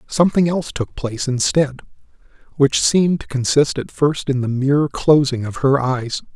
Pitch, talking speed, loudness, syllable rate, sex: 140 Hz, 170 wpm, -18 LUFS, 5.0 syllables/s, male